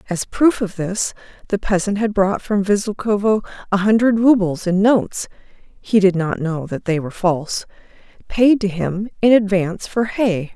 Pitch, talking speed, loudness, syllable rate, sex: 200 Hz, 170 wpm, -18 LUFS, 4.0 syllables/s, female